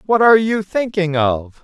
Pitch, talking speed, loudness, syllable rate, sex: 185 Hz, 185 wpm, -16 LUFS, 4.7 syllables/s, male